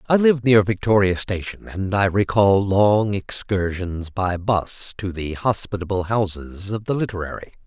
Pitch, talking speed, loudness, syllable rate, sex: 100 Hz, 150 wpm, -21 LUFS, 4.5 syllables/s, male